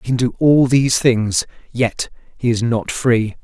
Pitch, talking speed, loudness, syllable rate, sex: 120 Hz, 190 wpm, -17 LUFS, 4.3 syllables/s, male